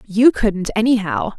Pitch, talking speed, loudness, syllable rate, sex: 220 Hz, 130 wpm, -17 LUFS, 4.2 syllables/s, female